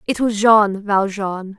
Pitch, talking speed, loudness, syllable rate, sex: 205 Hz, 150 wpm, -17 LUFS, 3.5 syllables/s, female